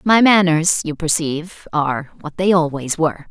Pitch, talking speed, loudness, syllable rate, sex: 165 Hz, 165 wpm, -17 LUFS, 5.0 syllables/s, female